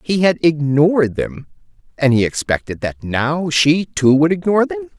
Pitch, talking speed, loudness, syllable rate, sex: 160 Hz, 170 wpm, -16 LUFS, 4.7 syllables/s, male